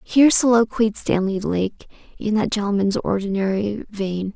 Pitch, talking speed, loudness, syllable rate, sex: 205 Hz, 125 wpm, -20 LUFS, 5.3 syllables/s, female